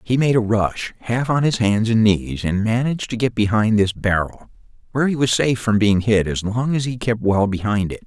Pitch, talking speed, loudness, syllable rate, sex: 110 Hz, 240 wpm, -19 LUFS, 5.3 syllables/s, male